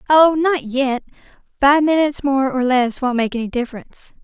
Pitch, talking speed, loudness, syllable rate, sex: 270 Hz, 170 wpm, -17 LUFS, 5.4 syllables/s, female